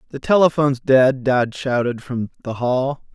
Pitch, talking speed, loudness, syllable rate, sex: 130 Hz, 155 wpm, -19 LUFS, 4.5 syllables/s, male